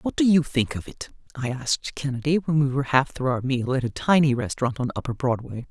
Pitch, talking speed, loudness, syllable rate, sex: 135 Hz, 240 wpm, -24 LUFS, 6.0 syllables/s, female